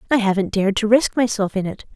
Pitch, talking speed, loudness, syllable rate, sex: 210 Hz, 245 wpm, -19 LUFS, 6.6 syllables/s, female